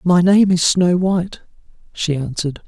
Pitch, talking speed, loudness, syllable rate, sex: 175 Hz, 155 wpm, -16 LUFS, 4.9 syllables/s, male